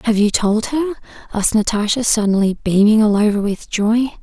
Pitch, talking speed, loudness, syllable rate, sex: 215 Hz, 170 wpm, -16 LUFS, 5.2 syllables/s, female